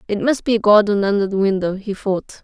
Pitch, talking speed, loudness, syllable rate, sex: 205 Hz, 245 wpm, -17 LUFS, 5.8 syllables/s, female